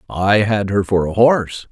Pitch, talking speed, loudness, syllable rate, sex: 105 Hz, 210 wpm, -16 LUFS, 4.6 syllables/s, male